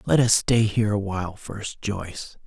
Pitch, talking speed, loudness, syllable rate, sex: 105 Hz, 170 wpm, -23 LUFS, 4.7 syllables/s, male